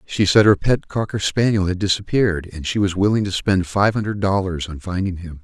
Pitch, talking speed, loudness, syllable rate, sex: 95 Hz, 220 wpm, -19 LUFS, 5.4 syllables/s, male